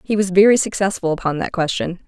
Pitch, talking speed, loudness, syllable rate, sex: 185 Hz, 205 wpm, -18 LUFS, 6.2 syllables/s, female